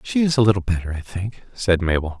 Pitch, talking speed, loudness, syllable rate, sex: 100 Hz, 245 wpm, -21 LUFS, 5.9 syllables/s, male